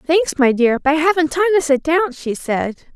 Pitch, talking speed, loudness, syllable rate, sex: 305 Hz, 245 wpm, -17 LUFS, 5.3 syllables/s, female